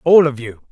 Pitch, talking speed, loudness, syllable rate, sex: 140 Hz, 250 wpm, -14 LUFS, 5.0 syllables/s, male